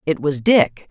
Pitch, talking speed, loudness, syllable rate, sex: 160 Hz, 200 wpm, -17 LUFS, 3.8 syllables/s, female